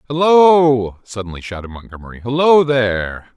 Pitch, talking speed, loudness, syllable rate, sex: 125 Hz, 105 wpm, -13 LUFS, 5.0 syllables/s, male